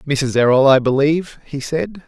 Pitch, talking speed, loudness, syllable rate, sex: 145 Hz, 175 wpm, -16 LUFS, 4.8 syllables/s, male